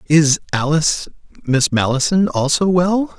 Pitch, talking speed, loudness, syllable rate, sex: 160 Hz, 95 wpm, -16 LUFS, 4.4 syllables/s, male